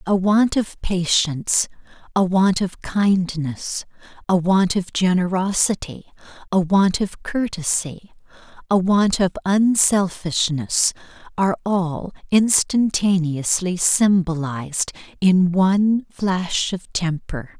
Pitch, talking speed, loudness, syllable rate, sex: 185 Hz, 100 wpm, -19 LUFS, 3.5 syllables/s, female